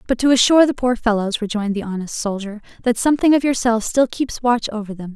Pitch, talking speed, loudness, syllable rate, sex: 230 Hz, 220 wpm, -18 LUFS, 6.4 syllables/s, female